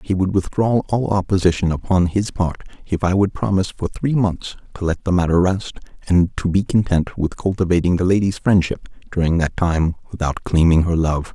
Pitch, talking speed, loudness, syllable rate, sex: 90 Hz, 190 wpm, -19 LUFS, 5.4 syllables/s, male